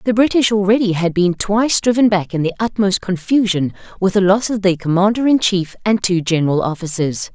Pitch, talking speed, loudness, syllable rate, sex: 195 Hz, 195 wpm, -16 LUFS, 5.6 syllables/s, female